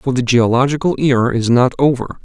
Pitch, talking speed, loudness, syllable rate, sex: 130 Hz, 190 wpm, -14 LUFS, 5.7 syllables/s, male